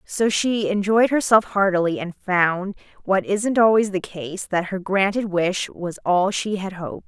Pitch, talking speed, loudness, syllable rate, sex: 195 Hz, 180 wpm, -21 LUFS, 4.2 syllables/s, female